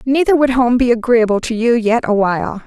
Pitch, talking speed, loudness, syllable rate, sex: 235 Hz, 200 wpm, -14 LUFS, 5.5 syllables/s, female